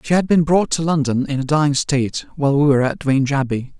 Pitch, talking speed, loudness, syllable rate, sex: 145 Hz, 255 wpm, -18 LUFS, 6.4 syllables/s, male